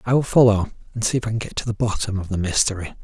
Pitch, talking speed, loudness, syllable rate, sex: 110 Hz, 295 wpm, -21 LUFS, 7.3 syllables/s, male